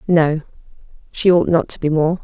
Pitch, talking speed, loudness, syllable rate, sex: 160 Hz, 190 wpm, -17 LUFS, 5.0 syllables/s, female